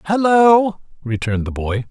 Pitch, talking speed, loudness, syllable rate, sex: 160 Hz, 125 wpm, -16 LUFS, 4.7 syllables/s, male